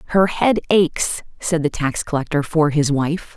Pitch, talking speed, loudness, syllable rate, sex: 160 Hz, 180 wpm, -19 LUFS, 4.6 syllables/s, female